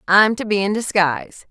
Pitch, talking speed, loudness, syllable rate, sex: 190 Hz, 200 wpm, -18 LUFS, 5.3 syllables/s, female